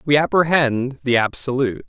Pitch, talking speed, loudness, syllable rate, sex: 130 Hz, 130 wpm, -18 LUFS, 5.3 syllables/s, male